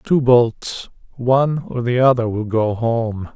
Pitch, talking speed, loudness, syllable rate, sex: 120 Hz, 160 wpm, -18 LUFS, 3.7 syllables/s, male